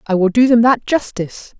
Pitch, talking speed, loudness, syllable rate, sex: 220 Hz, 225 wpm, -14 LUFS, 5.7 syllables/s, female